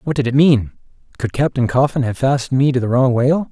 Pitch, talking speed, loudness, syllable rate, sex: 135 Hz, 240 wpm, -16 LUFS, 6.5 syllables/s, male